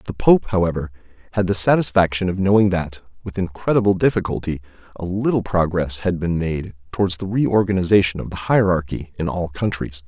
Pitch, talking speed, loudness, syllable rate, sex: 90 Hz, 160 wpm, -19 LUFS, 5.5 syllables/s, male